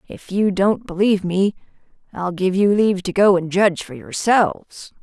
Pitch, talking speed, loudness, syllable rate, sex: 190 Hz, 180 wpm, -18 LUFS, 5.0 syllables/s, female